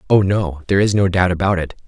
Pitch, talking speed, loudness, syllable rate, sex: 95 Hz, 255 wpm, -17 LUFS, 6.7 syllables/s, male